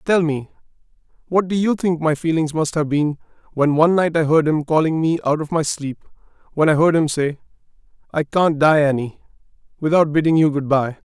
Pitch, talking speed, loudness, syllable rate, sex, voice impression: 155 Hz, 200 wpm, -18 LUFS, 5.4 syllables/s, male, masculine, adult-like, tensed, clear, slightly halting, slightly intellectual, sincere, calm, friendly, reassuring, kind, modest